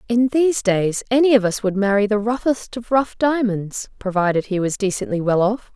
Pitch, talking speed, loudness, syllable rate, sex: 215 Hz, 200 wpm, -19 LUFS, 5.2 syllables/s, female